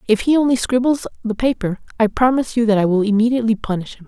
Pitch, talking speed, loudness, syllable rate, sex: 225 Hz, 220 wpm, -18 LUFS, 7.0 syllables/s, female